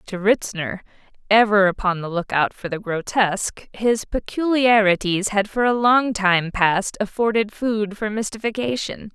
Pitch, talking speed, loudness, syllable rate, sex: 205 Hz, 140 wpm, -20 LUFS, 4.4 syllables/s, female